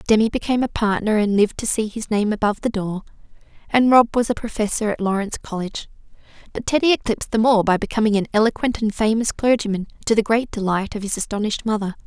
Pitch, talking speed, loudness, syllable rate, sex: 215 Hz, 205 wpm, -20 LUFS, 6.7 syllables/s, female